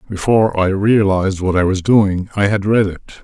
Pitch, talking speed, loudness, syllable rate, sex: 100 Hz, 205 wpm, -15 LUFS, 5.4 syllables/s, male